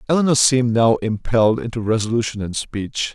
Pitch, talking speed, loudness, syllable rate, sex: 115 Hz, 150 wpm, -18 LUFS, 5.8 syllables/s, male